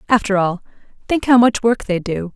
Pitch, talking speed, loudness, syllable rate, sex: 215 Hz, 205 wpm, -17 LUFS, 5.2 syllables/s, female